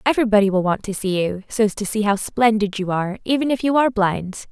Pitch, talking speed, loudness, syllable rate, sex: 210 Hz, 240 wpm, -20 LUFS, 6.1 syllables/s, female